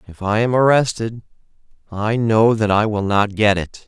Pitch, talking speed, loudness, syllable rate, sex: 110 Hz, 185 wpm, -17 LUFS, 4.6 syllables/s, male